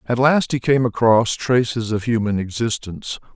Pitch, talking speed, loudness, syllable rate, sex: 115 Hz, 160 wpm, -19 LUFS, 4.9 syllables/s, male